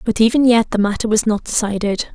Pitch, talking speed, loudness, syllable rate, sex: 220 Hz, 225 wpm, -16 LUFS, 5.9 syllables/s, female